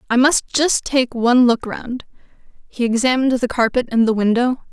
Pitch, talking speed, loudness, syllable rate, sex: 245 Hz, 180 wpm, -17 LUFS, 5.2 syllables/s, female